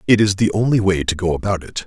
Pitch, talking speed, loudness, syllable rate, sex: 100 Hz, 290 wpm, -18 LUFS, 6.4 syllables/s, male